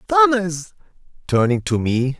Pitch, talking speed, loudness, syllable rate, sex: 170 Hz, 110 wpm, -18 LUFS, 3.4 syllables/s, male